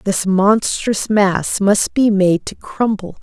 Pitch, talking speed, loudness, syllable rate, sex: 200 Hz, 150 wpm, -15 LUFS, 3.2 syllables/s, female